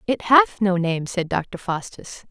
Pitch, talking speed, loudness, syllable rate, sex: 200 Hz, 180 wpm, -20 LUFS, 3.9 syllables/s, female